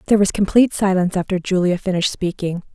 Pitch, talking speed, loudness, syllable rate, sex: 185 Hz, 175 wpm, -18 LUFS, 7.3 syllables/s, female